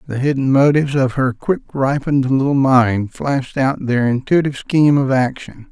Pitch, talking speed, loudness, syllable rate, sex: 135 Hz, 170 wpm, -16 LUFS, 5.3 syllables/s, male